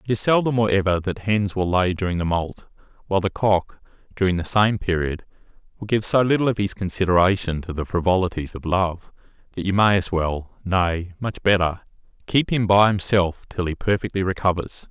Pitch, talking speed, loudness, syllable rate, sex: 95 Hz, 190 wpm, -21 LUFS, 5.3 syllables/s, male